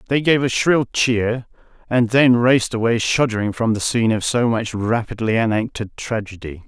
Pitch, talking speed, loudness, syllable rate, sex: 115 Hz, 170 wpm, -18 LUFS, 5.0 syllables/s, male